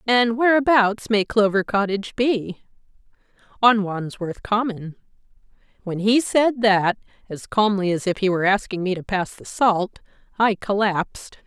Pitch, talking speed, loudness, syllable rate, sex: 205 Hz, 140 wpm, -20 LUFS, 4.5 syllables/s, female